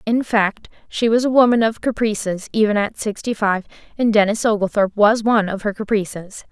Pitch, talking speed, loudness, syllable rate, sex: 215 Hz, 185 wpm, -18 LUFS, 5.5 syllables/s, female